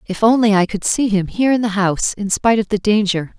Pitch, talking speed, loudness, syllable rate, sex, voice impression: 210 Hz, 265 wpm, -16 LUFS, 6.1 syllables/s, female, very feminine, adult-like, slightly intellectual, slightly calm